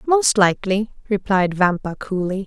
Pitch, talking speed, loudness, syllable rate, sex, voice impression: 200 Hz, 120 wpm, -19 LUFS, 4.7 syllables/s, female, feminine, adult-like, powerful, slightly bright, fluent, raspy, intellectual, calm, friendly, elegant, slightly sharp